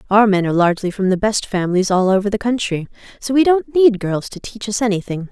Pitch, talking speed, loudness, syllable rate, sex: 205 Hz, 235 wpm, -17 LUFS, 6.2 syllables/s, female